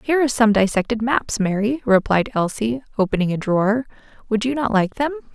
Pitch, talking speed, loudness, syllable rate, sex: 225 Hz, 180 wpm, -20 LUFS, 5.8 syllables/s, female